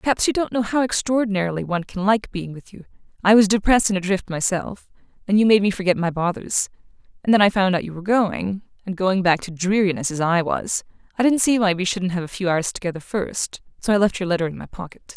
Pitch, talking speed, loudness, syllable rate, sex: 195 Hz, 225 wpm, -20 LUFS, 6.1 syllables/s, female